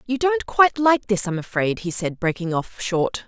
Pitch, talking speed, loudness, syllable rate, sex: 215 Hz, 220 wpm, -21 LUFS, 4.8 syllables/s, female